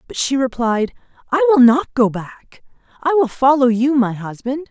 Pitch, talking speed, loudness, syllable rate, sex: 255 Hz, 180 wpm, -16 LUFS, 4.5 syllables/s, female